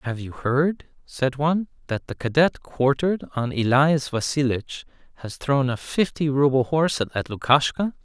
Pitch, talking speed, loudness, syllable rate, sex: 135 Hz, 150 wpm, -22 LUFS, 4.5 syllables/s, male